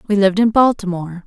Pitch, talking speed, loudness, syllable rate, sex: 200 Hz, 190 wpm, -16 LUFS, 7.3 syllables/s, female